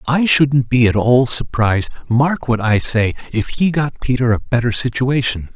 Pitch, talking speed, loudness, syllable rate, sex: 125 Hz, 175 wpm, -16 LUFS, 4.6 syllables/s, male